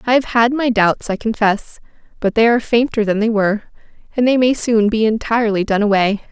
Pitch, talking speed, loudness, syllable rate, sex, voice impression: 220 Hz, 210 wpm, -16 LUFS, 5.7 syllables/s, female, feminine, adult-like, tensed, powerful, bright, soft, clear, fluent, intellectual, calm, friendly, reassuring, elegant, lively, slightly sharp